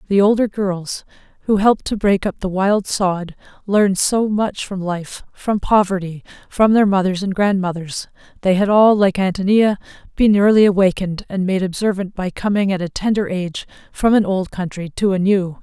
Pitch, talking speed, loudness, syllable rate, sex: 195 Hz, 180 wpm, -17 LUFS, 5.0 syllables/s, female